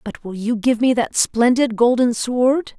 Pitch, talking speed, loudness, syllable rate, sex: 240 Hz, 195 wpm, -17 LUFS, 4.1 syllables/s, female